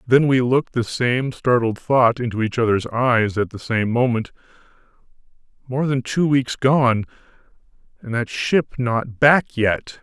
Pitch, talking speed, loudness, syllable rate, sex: 120 Hz, 155 wpm, -19 LUFS, 4.2 syllables/s, male